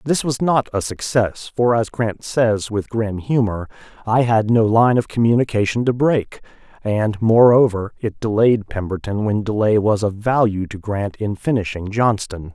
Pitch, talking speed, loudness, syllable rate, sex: 110 Hz, 165 wpm, -18 LUFS, 4.5 syllables/s, male